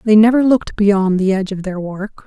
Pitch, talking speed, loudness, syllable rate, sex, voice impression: 205 Hz, 240 wpm, -15 LUFS, 5.6 syllables/s, female, very feminine, very adult-like, very middle-aged, very thin, very relaxed, very weak, slightly dark, very soft, muffled, fluent, cute, slightly cool, very intellectual, refreshing, very sincere, very calm, very friendly, very reassuring, very unique, very elegant, slightly wild, very sweet, slightly lively, very kind, very modest, slightly light